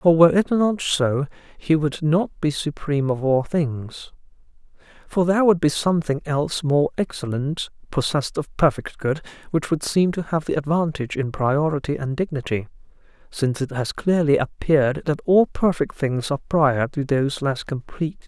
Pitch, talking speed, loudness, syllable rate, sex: 150 Hz, 165 wpm, -22 LUFS, 5.0 syllables/s, male